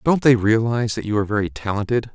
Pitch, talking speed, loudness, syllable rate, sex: 110 Hz, 225 wpm, -20 LUFS, 6.8 syllables/s, male